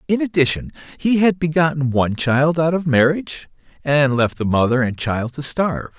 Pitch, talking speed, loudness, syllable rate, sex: 145 Hz, 180 wpm, -18 LUFS, 5.3 syllables/s, male